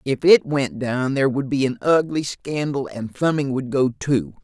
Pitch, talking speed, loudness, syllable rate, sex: 135 Hz, 205 wpm, -21 LUFS, 4.6 syllables/s, male